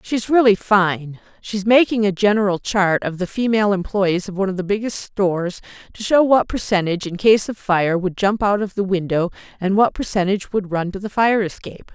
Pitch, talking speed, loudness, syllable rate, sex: 200 Hz, 205 wpm, -19 LUFS, 5.4 syllables/s, female